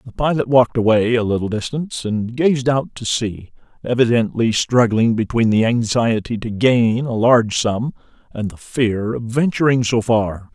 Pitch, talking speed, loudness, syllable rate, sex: 115 Hz, 165 wpm, -18 LUFS, 4.6 syllables/s, male